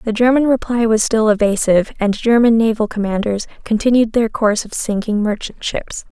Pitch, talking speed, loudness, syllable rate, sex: 220 Hz, 165 wpm, -16 LUFS, 5.4 syllables/s, female